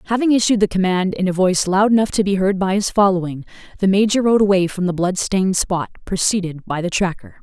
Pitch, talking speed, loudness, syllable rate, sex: 190 Hz, 220 wpm, -17 LUFS, 6.1 syllables/s, female